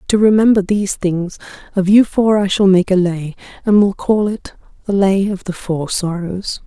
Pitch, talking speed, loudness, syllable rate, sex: 195 Hz, 200 wpm, -15 LUFS, 4.7 syllables/s, female